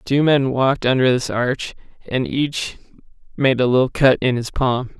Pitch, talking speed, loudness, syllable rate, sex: 130 Hz, 190 wpm, -18 LUFS, 4.8 syllables/s, male